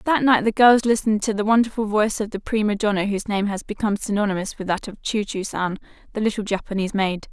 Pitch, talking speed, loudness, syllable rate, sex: 210 Hz, 230 wpm, -21 LUFS, 6.6 syllables/s, female